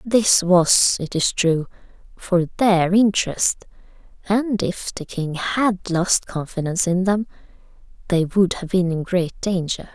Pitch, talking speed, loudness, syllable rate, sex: 185 Hz, 145 wpm, -20 LUFS, 3.9 syllables/s, female